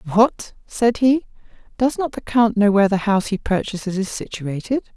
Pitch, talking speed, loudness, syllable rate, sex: 215 Hz, 180 wpm, -19 LUFS, 5.0 syllables/s, female